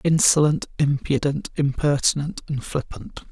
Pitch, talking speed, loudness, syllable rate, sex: 145 Hz, 90 wpm, -22 LUFS, 4.4 syllables/s, male